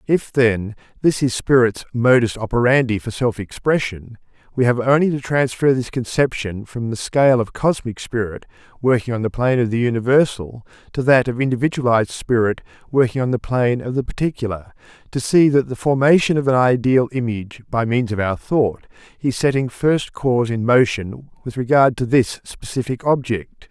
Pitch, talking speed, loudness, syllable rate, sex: 120 Hz, 170 wpm, -18 LUFS, 5.3 syllables/s, male